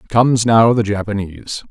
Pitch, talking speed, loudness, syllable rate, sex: 110 Hz, 140 wpm, -15 LUFS, 5.4 syllables/s, male